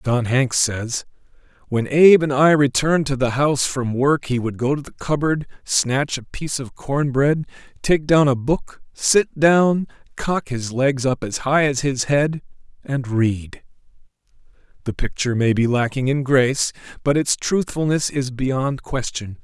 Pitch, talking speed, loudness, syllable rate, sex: 135 Hz, 170 wpm, -19 LUFS, 4.3 syllables/s, male